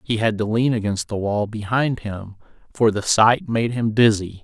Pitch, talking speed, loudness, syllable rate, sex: 110 Hz, 205 wpm, -20 LUFS, 4.6 syllables/s, male